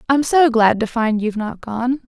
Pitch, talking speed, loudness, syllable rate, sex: 235 Hz, 225 wpm, -17 LUFS, 4.8 syllables/s, female